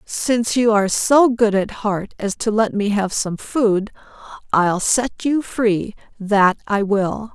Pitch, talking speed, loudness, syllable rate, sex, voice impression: 215 Hz, 170 wpm, -18 LUFS, 3.7 syllables/s, female, feminine, middle-aged, powerful, bright, slightly soft, raspy, friendly, reassuring, elegant, kind